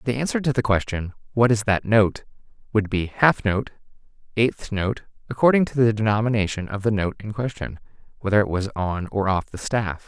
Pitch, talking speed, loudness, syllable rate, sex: 110 Hz, 190 wpm, -22 LUFS, 5.2 syllables/s, male